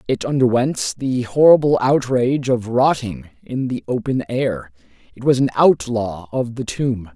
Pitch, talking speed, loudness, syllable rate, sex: 120 Hz, 150 wpm, -18 LUFS, 4.3 syllables/s, male